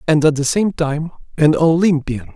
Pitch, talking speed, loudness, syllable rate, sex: 155 Hz, 180 wpm, -16 LUFS, 4.8 syllables/s, male